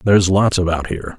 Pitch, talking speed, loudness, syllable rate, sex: 95 Hz, 205 wpm, -16 LUFS, 6.5 syllables/s, male